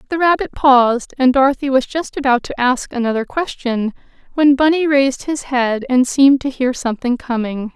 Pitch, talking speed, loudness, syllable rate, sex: 260 Hz, 180 wpm, -16 LUFS, 5.3 syllables/s, female